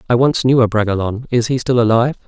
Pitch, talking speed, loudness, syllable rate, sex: 120 Hz, 210 wpm, -15 LUFS, 7.0 syllables/s, male